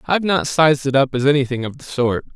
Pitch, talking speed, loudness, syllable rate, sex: 140 Hz, 255 wpm, -18 LUFS, 6.6 syllables/s, male